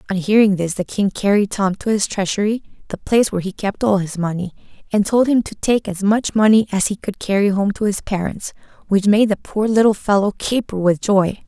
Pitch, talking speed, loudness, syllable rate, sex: 200 Hz, 225 wpm, -18 LUFS, 5.5 syllables/s, female